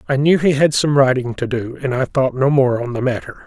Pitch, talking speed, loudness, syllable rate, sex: 135 Hz, 275 wpm, -17 LUFS, 5.8 syllables/s, male